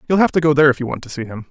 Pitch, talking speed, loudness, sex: 145 Hz, 440 wpm, -16 LUFS, male